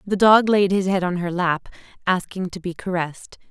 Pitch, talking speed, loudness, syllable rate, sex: 185 Hz, 205 wpm, -21 LUFS, 5.4 syllables/s, female